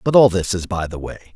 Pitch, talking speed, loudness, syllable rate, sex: 100 Hz, 310 wpm, -18 LUFS, 6.4 syllables/s, male